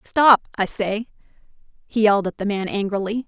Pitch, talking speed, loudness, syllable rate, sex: 210 Hz, 165 wpm, -20 LUFS, 5.3 syllables/s, female